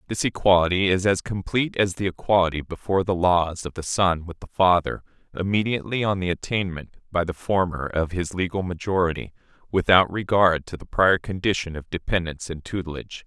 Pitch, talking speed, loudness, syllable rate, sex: 90 Hz, 170 wpm, -23 LUFS, 5.7 syllables/s, male